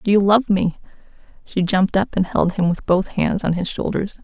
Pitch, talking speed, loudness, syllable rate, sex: 190 Hz, 225 wpm, -19 LUFS, 5.2 syllables/s, female